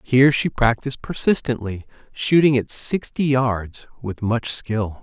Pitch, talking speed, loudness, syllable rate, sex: 125 Hz, 130 wpm, -20 LUFS, 4.2 syllables/s, male